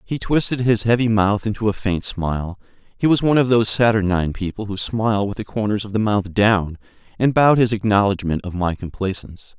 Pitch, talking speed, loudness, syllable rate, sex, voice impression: 105 Hz, 190 wpm, -19 LUFS, 5.9 syllables/s, male, masculine, adult-like, slightly tensed, powerful, clear, intellectual, calm, slightly mature, reassuring, wild, lively